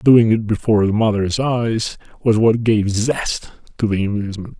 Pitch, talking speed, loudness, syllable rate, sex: 110 Hz, 170 wpm, -18 LUFS, 4.6 syllables/s, male